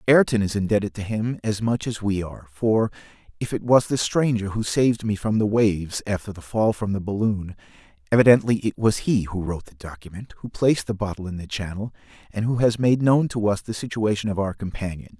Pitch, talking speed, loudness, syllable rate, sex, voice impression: 105 Hz, 215 wpm, -23 LUFS, 5.7 syllables/s, male, very masculine, very adult-like, cool, sincere, calm